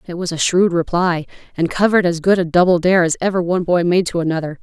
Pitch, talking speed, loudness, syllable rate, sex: 175 Hz, 245 wpm, -16 LUFS, 6.5 syllables/s, female